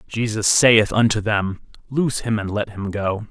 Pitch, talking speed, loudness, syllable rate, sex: 110 Hz, 180 wpm, -19 LUFS, 4.6 syllables/s, male